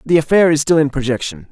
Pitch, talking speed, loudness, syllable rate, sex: 145 Hz, 240 wpm, -15 LUFS, 6.4 syllables/s, male